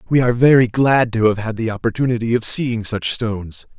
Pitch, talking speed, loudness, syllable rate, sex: 115 Hz, 205 wpm, -17 LUFS, 5.7 syllables/s, male